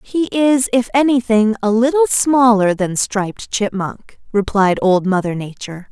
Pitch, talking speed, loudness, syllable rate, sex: 225 Hz, 140 wpm, -16 LUFS, 4.4 syllables/s, female